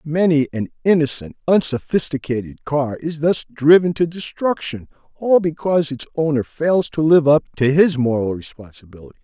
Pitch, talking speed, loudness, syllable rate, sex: 145 Hz, 145 wpm, -18 LUFS, 5.0 syllables/s, male